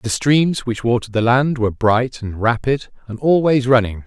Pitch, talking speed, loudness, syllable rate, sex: 120 Hz, 190 wpm, -17 LUFS, 4.9 syllables/s, male